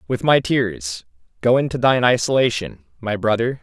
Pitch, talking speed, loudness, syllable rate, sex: 115 Hz, 150 wpm, -19 LUFS, 5.0 syllables/s, male